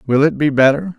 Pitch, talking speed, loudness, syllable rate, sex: 145 Hz, 245 wpm, -14 LUFS, 5.9 syllables/s, male